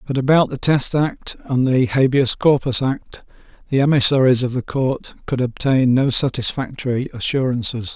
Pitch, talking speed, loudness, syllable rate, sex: 135 Hz, 150 wpm, -18 LUFS, 4.8 syllables/s, male